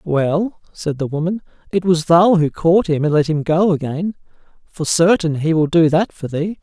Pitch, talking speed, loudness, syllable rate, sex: 165 Hz, 210 wpm, -17 LUFS, 4.6 syllables/s, male